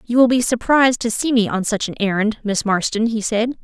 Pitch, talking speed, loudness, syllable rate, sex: 225 Hz, 245 wpm, -18 LUFS, 5.6 syllables/s, female